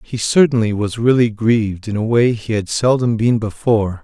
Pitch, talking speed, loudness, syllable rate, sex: 110 Hz, 195 wpm, -16 LUFS, 5.1 syllables/s, male